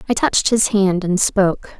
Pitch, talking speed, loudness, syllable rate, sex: 200 Hz, 200 wpm, -16 LUFS, 5.2 syllables/s, female